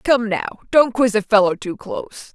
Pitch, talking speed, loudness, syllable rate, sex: 220 Hz, 205 wpm, -18 LUFS, 5.1 syllables/s, female